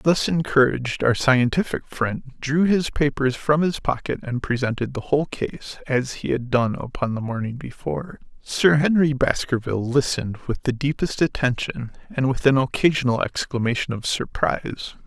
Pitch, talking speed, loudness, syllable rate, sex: 135 Hz, 155 wpm, -22 LUFS, 5.0 syllables/s, male